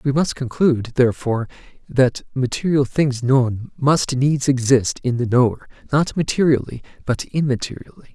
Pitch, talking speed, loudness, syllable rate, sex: 130 Hz, 135 wpm, -19 LUFS, 5.1 syllables/s, male